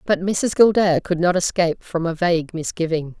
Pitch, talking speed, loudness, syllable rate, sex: 175 Hz, 170 wpm, -19 LUFS, 5.3 syllables/s, female